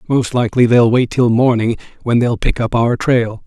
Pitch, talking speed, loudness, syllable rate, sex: 120 Hz, 210 wpm, -14 LUFS, 5.0 syllables/s, male